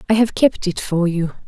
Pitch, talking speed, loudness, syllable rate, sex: 195 Hz, 245 wpm, -18 LUFS, 5.2 syllables/s, female